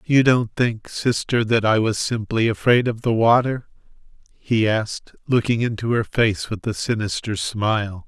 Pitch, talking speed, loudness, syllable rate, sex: 110 Hz, 165 wpm, -20 LUFS, 4.5 syllables/s, male